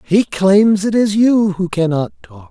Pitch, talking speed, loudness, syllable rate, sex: 190 Hz, 190 wpm, -14 LUFS, 4.0 syllables/s, male